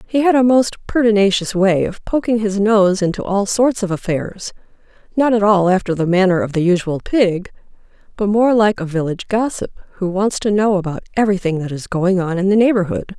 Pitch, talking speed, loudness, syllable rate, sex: 200 Hz, 200 wpm, -16 LUFS, 5.6 syllables/s, female